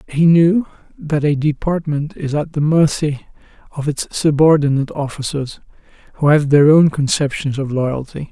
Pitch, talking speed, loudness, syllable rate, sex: 150 Hz, 145 wpm, -16 LUFS, 4.8 syllables/s, male